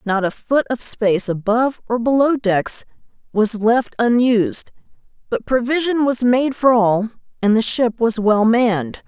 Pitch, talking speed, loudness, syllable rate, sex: 230 Hz, 160 wpm, -17 LUFS, 4.4 syllables/s, female